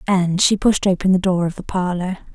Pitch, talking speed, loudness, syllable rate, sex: 185 Hz, 230 wpm, -18 LUFS, 5.3 syllables/s, female